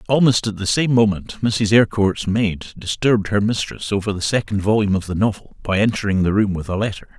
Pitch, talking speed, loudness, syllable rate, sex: 105 Hz, 210 wpm, -19 LUFS, 6.0 syllables/s, male